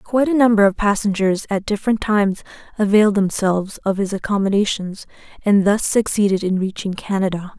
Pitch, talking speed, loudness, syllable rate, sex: 200 Hz, 150 wpm, -18 LUFS, 5.8 syllables/s, female